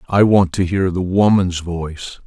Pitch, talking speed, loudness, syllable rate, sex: 90 Hz, 185 wpm, -16 LUFS, 4.4 syllables/s, male